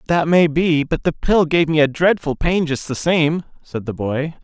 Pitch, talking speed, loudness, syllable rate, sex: 160 Hz, 230 wpm, -18 LUFS, 4.4 syllables/s, male